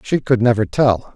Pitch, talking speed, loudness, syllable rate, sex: 120 Hz, 210 wpm, -16 LUFS, 4.8 syllables/s, male